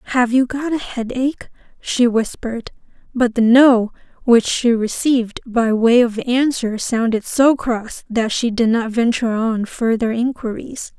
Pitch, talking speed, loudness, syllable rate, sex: 235 Hz, 155 wpm, -17 LUFS, 4.3 syllables/s, female